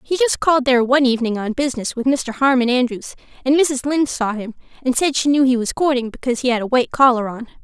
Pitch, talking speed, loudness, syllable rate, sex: 255 Hz, 245 wpm, -18 LUFS, 6.7 syllables/s, female